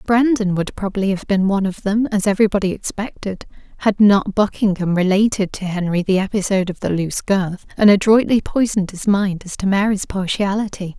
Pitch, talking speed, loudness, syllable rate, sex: 200 Hz, 175 wpm, -18 LUFS, 5.7 syllables/s, female